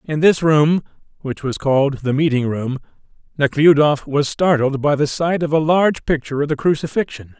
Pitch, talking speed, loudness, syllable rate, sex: 145 Hz, 180 wpm, -17 LUFS, 5.2 syllables/s, male